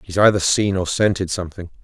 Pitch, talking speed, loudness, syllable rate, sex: 95 Hz, 195 wpm, -18 LUFS, 6.1 syllables/s, male